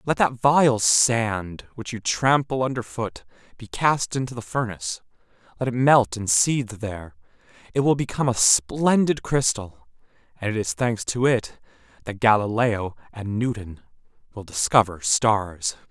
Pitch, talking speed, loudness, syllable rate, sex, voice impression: 115 Hz, 145 wpm, -22 LUFS, 4.3 syllables/s, male, masculine, adult-like, slightly powerful, slightly halting, raspy, cool, sincere, friendly, reassuring, wild, lively, kind